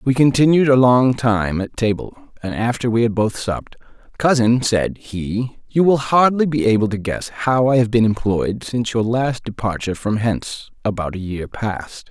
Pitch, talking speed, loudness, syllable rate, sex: 115 Hz, 190 wpm, -18 LUFS, 4.8 syllables/s, male